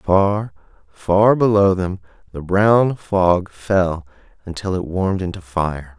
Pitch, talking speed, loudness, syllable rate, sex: 95 Hz, 140 wpm, -18 LUFS, 3.8 syllables/s, male